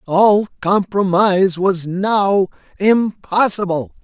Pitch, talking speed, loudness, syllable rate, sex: 190 Hz, 75 wpm, -16 LUFS, 3.2 syllables/s, male